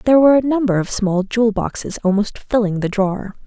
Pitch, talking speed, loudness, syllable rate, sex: 215 Hz, 210 wpm, -17 LUFS, 6.0 syllables/s, female